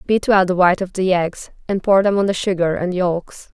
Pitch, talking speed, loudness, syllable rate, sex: 185 Hz, 250 wpm, -17 LUFS, 5.2 syllables/s, female